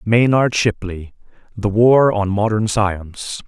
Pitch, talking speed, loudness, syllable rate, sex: 105 Hz, 120 wpm, -16 LUFS, 3.8 syllables/s, male